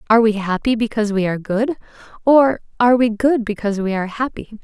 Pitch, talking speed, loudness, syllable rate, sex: 220 Hz, 195 wpm, -18 LUFS, 6.6 syllables/s, female